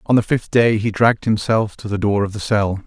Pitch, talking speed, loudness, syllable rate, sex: 105 Hz, 270 wpm, -18 LUFS, 5.4 syllables/s, male